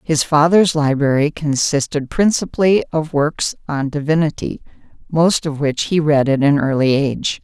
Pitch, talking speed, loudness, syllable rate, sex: 150 Hz, 145 wpm, -16 LUFS, 4.7 syllables/s, female